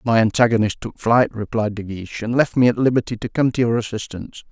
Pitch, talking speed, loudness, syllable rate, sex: 115 Hz, 225 wpm, -19 LUFS, 6.2 syllables/s, male